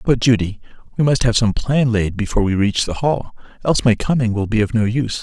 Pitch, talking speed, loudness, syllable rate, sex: 115 Hz, 240 wpm, -18 LUFS, 6.1 syllables/s, male